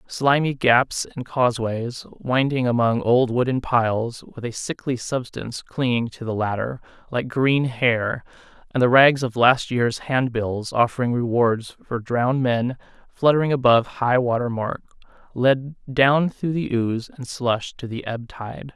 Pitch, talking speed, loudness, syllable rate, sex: 125 Hz, 155 wpm, -21 LUFS, 4.2 syllables/s, male